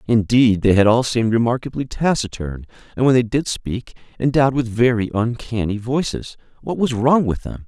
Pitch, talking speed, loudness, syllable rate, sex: 120 Hz, 170 wpm, -19 LUFS, 5.3 syllables/s, male